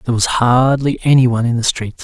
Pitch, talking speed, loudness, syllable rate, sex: 120 Hz, 205 wpm, -14 LUFS, 5.8 syllables/s, male